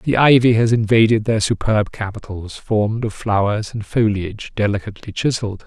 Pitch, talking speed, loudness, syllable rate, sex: 110 Hz, 150 wpm, -18 LUFS, 5.4 syllables/s, male